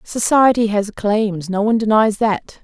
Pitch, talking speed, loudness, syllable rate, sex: 215 Hz, 160 wpm, -16 LUFS, 4.4 syllables/s, female